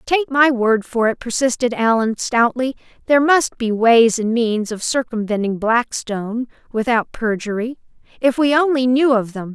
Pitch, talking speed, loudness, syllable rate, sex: 240 Hz, 155 wpm, -18 LUFS, 4.4 syllables/s, female